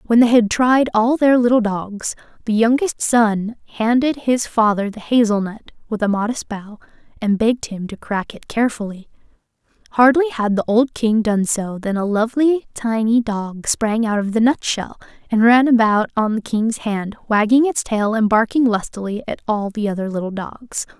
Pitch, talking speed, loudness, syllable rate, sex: 225 Hz, 185 wpm, -18 LUFS, 4.7 syllables/s, female